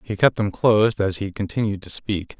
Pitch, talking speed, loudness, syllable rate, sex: 105 Hz, 225 wpm, -21 LUFS, 5.2 syllables/s, male